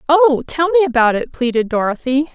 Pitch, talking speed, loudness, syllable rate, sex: 280 Hz, 180 wpm, -16 LUFS, 5.2 syllables/s, female